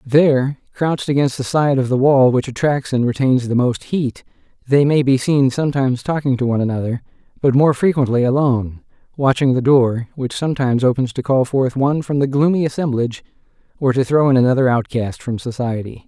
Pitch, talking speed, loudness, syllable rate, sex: 130 Hz, 185 wpm, -17 LUFS, 5.8 syllables/s, male